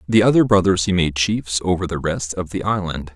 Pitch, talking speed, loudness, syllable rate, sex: 90 Hz, 230 wpm, -19 LUFS, 5.4 syllables/s, male